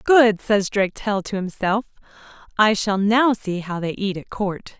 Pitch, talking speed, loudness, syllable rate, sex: 205 Hz, 175 wpm, -21 LUFS, 4.3 syllables/s, female